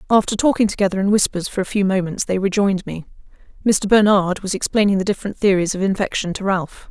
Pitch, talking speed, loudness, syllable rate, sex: 195 Hz, 200 wpm, -18 LUFS, 6.4 syllables/s, female